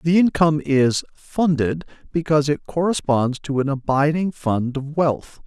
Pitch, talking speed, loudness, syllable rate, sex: 150 Hz, 145 wpm, -20 LUFS, 4.5 syllables/s, male